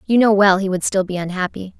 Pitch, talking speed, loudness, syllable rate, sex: 195 Hz, 265 wpm, -17 LUFS, 6.1 syllables/s, female